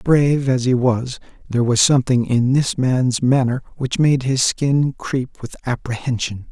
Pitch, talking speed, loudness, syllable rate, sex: 130 Hz, 165 wpm, -18 LUFS, 4.4 syllables/s, male